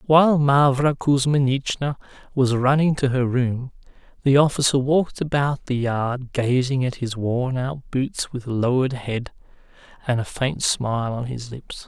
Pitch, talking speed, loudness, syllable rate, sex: 130 Hz, 150 wpm, -21 LUFS, 4.4 syllables/s, male